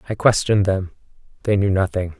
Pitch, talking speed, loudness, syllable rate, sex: 100 Hz, 165 wpm, -19 LUFS, 6.0 syllables/s, male